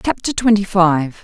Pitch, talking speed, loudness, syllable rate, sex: 195 Hz, 145 wpm, -15 LUFS, 4.4 syllables/s, female